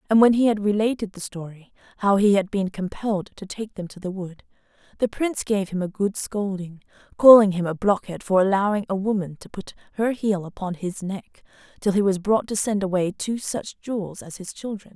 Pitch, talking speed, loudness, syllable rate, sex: 200 Hz, 215 wpm, -23 LUFS, 5.4 syllables/s, female